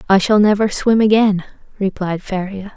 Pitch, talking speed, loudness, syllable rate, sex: 200 Hz, 150 wpm, -16 LUFS, 4.9 syllables/s, female